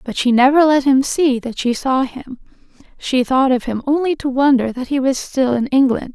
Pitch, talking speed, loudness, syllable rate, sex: 265 Hz, 225 wpm, -16 LUFS, 5.0 syllables/s, female